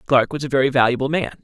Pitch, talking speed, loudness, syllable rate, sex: 135 Hz, 250 wpm, -19 LUFS, 7.0 syllables/s, male